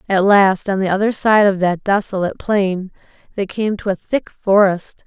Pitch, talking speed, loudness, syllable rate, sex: 195 Hz, 190 wpm, -16 LUFS, 4.7 syllables/s, female